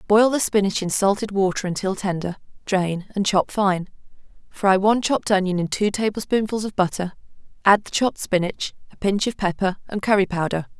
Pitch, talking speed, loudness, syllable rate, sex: 195 Hz, 180 wpm, -21 LUFS, 5.5 syllables/s, female